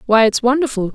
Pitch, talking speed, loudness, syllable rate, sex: 240 Hz, 190 wpm, -15 LUFS, 6.2 syllables/s, female